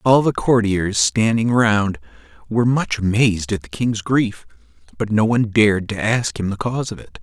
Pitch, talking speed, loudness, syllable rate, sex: 110 Hz, 190 wpm, -18 LUFS, 5.0 syllables/s, male